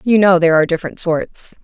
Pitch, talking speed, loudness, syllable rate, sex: 175 Hz, 220 wpm, -14 LUFS, 6.8 syllables/s, female